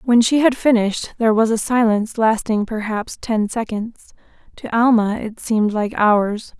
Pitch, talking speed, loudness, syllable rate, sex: 225 Hz, 165 wpm, -18 LUFS, 4.7 syllables/s, female